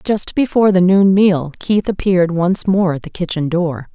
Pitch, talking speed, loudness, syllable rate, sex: 180 Hz, 200 wpm, -15 LUFS, 4.8 syllables/s, female